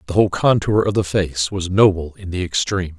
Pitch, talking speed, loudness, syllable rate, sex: 95 Hz, 220 wpm, -18 LUFS, 5.7 syllables/s, male